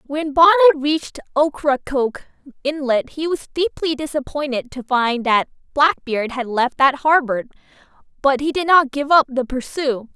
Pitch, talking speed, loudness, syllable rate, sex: 280 Hz, 150 wpm, -18 LUFS, 4.6 syllables/s, female